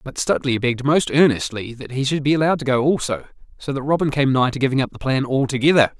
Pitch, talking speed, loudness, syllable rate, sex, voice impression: 135 Hz, 250 wpm, -19 LUFS, 6.7 syllables/s, male, masculine, adult-like, tensed, powerful, bright, clear, cool, intellectual, sincere, friendly, unique, wild, lively, slightly strict, intense